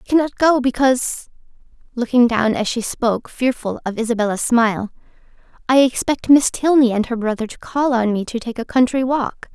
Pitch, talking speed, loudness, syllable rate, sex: 245 Hz, 170 wpm, -18 LUFS, 5.5 syllables/s, female